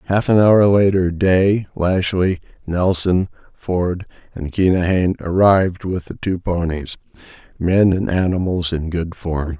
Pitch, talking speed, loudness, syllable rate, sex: 90 Hz, 125 wpm, -17 LUFS, 4.1 syllables/s, male